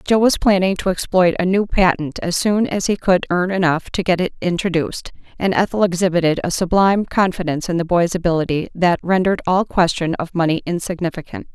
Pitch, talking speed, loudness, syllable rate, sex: 180 Hz, 185 wpm, -18 LUFS, 5.8 syllables/s, female